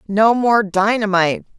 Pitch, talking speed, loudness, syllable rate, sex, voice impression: 210 Hz, 115 wpm, -16 LUFS, 4.6 syllables/s, female, feminine, adult-like, tensed, powerful, clear, fluent, intellectual, reassuring, elegant, lively, slightly sharp